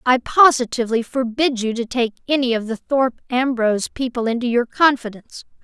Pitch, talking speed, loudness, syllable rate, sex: 245 Hz, 160 wpm, -19 LUFS, 5.6 syllables/s, female